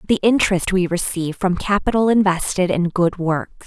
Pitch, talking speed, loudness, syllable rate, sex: 185 Hz, 165 wpm, -18 LUFS, 5.1 syllables/s, female